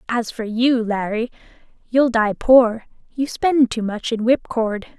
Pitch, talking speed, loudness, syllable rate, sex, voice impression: 235 Hz, 155 wpm, -19 LUFS, 3.9 syllables/s, female, very feminine, slightly adult-like, soft, cute, calm, slightly sweet, kind